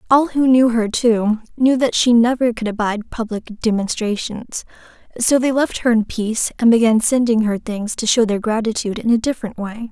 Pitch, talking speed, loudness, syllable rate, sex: 230 Hz, 195 wpm, -17 LUFS, 5.4 syllables/s, female